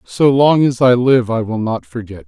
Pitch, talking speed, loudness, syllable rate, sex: 125 Hz, 235 wpm, -14 LUFS, 4.6 syllables/s, male